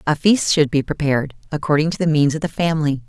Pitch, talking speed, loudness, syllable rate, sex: 150 Hz, 235 wpm, -18 LUFS, 6.6 syllables/s, female